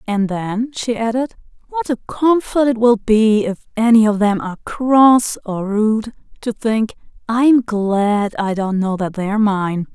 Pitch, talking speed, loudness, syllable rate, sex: 220 Hz, 175 wpm, -17 LUFS, 4.0 syllables/s, female